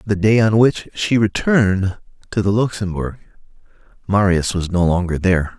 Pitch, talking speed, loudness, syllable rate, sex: 100 Hz, 150 wpm, -17 LUFS, 4.9 syllables/s, male